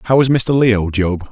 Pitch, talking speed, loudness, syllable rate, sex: 110 Hz, 230 wpm, -14 LUFS, 4.4 syllables/s, male